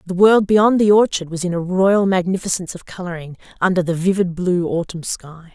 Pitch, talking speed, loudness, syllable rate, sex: 180 Hz, 195 wpm, -17 LUFS, 5.5 syllables/s, female